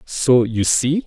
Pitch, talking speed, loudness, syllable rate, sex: 135 Hz, 170 wpm, -17 LUFS, 3.1 syllables/s, male